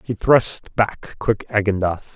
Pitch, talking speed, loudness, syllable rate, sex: 105 Hz, 140 wpm, -20 LUFS, 3.7 syllables/s, male